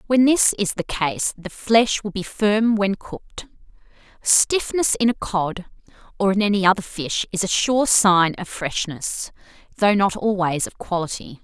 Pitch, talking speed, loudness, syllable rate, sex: 200 Hz, 170 wpm, -20 LUFS, 4.3 syllables/s, female